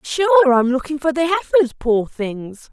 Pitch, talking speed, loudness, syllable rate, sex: 270 Hz, 175 wpm, -17 LUFS, 5.1 syllables/s, female